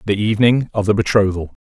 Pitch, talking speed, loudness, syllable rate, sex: 105 Hz, 185 wpm, -16 LUFS, 6.5 syllables/s, male